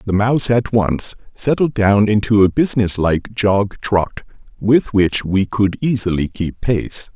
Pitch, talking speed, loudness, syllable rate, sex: 105 Hz, 160 wpm, -17 LUFS, 4.1 syllables/s, male